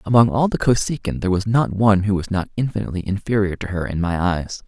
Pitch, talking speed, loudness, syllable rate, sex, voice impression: 100 Hz, 230 wpm, -20 LUFS, 6.5 syllables/s, male, masculine, adult-like, slightly soft, slightly cool, sincere, slightly calm, friendly